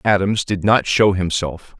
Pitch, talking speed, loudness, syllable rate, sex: 95 Hz, 170 wpm, -17 LUFS, 4.2 syllables/s, male